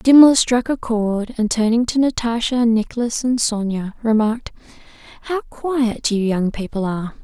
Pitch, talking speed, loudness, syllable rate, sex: 230 Hz, 150 wpm, -18 LUFS, 4.7 syllables/s, female